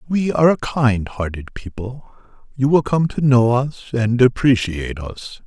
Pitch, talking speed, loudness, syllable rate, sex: 125 Hz, 155 wpm, -18 LUFS, 4.3 syllables/s, male